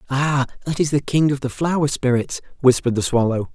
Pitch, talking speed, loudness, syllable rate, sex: 135 Hz, 205 wpm, -20 LUFS, 5.8 syllables/s, male